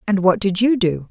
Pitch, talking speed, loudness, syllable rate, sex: 195 Hz, 270 wpm, -17 LUFS, 5.2 syllables/s, female